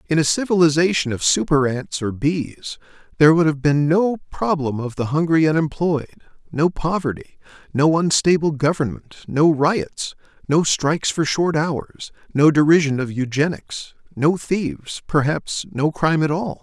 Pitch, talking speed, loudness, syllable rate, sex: 150 Hz, 150 wpm, -19 LUFS, 4.7 syllables/s, male